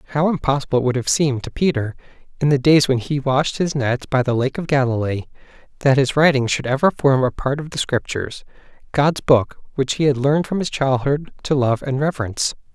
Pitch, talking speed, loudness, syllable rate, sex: 135 Hz, 205 wpm, -19 LUFS, 5.8 syllables/s, male